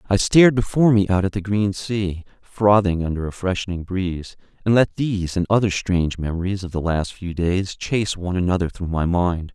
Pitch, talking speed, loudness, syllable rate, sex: 95 Hz, 200 wpm, -20 LUFS, 5.5 syllables/s, male